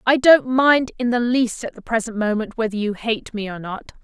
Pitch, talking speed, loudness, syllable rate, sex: 230 Hz, 240 wpm, -19 LUFS, 5.1 syllables/s, female